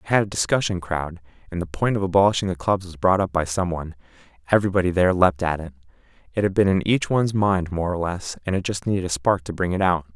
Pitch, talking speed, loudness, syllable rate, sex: 90 Hz, 240 wpm, -22 LUFS, 6.8 syllables/s, male